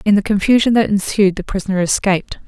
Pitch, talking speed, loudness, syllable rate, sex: 200 Hz, 195 wpm, -16 LUFS, 6.4 syllables/s, female